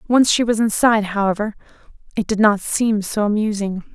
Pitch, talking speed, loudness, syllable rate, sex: 215 Hz, 165 wpm, -18 LUFS, 5.3 syllables/s, female